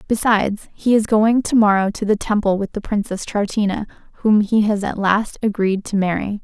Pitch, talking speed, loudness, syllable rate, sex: 210 Hz, 195 wpm, -18 LUFS, 5.1 syllables/s, female